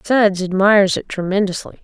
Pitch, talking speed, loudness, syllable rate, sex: 200 Hz, 130 wpm, -16 LUFS, 5.3 syllables/s, female